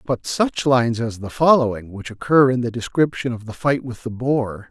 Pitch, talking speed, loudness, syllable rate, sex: 120 Hz, 215 wpm, -20 LUFS, 5.0 syllables/s, male